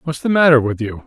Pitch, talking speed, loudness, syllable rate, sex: 140 Hz, 280 wpm, -15 LUFS, 6.4 syllables/s, male